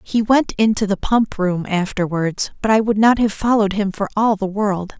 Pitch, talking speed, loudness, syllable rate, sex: 205 Hz, 215 wpm, -18 LUFS, 5.0 syllables/s, female